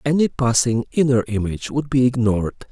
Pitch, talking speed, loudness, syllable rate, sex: 125 Hz, 155 wpm, -19 LUFS, 5.9 syllables/s, male